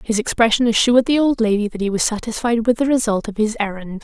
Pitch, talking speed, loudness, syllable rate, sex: 225 Hz, 240 wpm, -18 LUFS, 6.3 syllables/s, female